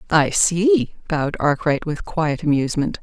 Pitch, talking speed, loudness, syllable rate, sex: 165 Hz, 140 wpm, -19 LUFS, 4.5 syllables/s, female